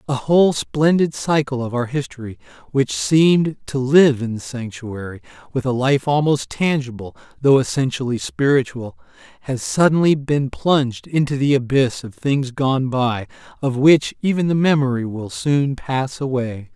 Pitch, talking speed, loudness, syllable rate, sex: 135 Hz, 150 wpm, -19 LUFS, 4.6 syllables/s, male